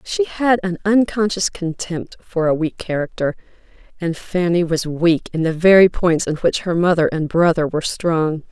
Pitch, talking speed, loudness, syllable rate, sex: 175 Hz, 175 wpm, -18 LUFS, 4.6 syllables/s, female